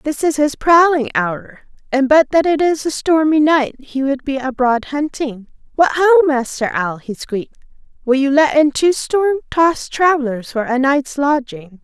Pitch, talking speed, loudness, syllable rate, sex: 280 Hz, 175 wpm, -16 LUFS, 4.6 syllables/s, female